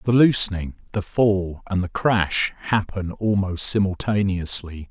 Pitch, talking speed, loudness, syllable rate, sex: 100 Hz, 120 wpm, -21 LUFS, 4.1 syllables/s, male